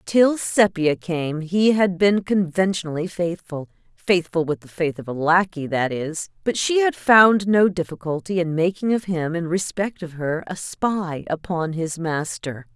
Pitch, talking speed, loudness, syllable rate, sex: 175 Hz, 160 wpm, -21 LUFS, 4.2 syllables/s, female